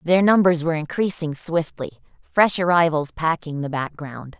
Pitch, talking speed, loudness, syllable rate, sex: 160 Hz, 135 wpm, -20 LUFS, 4.7 syllables/s, female